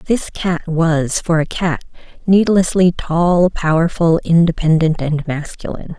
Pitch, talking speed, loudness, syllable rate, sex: 165 Hz, 120 wpm, -15 LUFS, 4.0 syllables/s, female